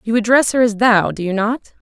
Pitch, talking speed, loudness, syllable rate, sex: 220 Hz, 255 wpm, -15 LUFS, 5.4 syllables/s, female